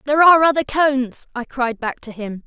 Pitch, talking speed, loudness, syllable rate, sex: 265 Hz, 220 wpm, -17 LUFS, 5.8 syllables/s, female